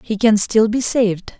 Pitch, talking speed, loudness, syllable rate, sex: 215 Hz, 215 wpm, -16 LUFS, 4.8 syllables/s, female